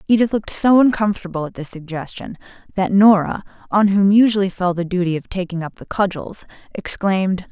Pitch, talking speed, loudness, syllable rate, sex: 190 Hz, 170 wpm, -18 LUFS, 5.7 syllables/s, female